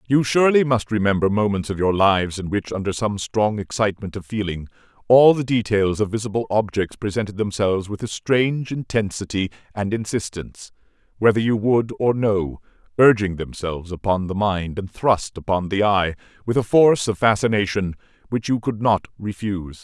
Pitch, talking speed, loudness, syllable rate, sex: 105 Hz, 165 wpm, -21 LUFS, 5.4 syllables/s, male